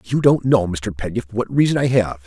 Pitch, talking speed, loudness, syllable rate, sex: 110 Hz, 240 wpm, -18 LUFS, 6.0 syllables/s, male